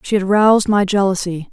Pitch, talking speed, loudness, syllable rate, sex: 195 Hz, 195 wpm, -15 LUFS, 5.7 syllables/s, female